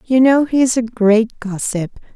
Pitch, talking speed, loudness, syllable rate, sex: 235 Hz, 195 wpm, -15 LUFS, 4.4 syllables/s, female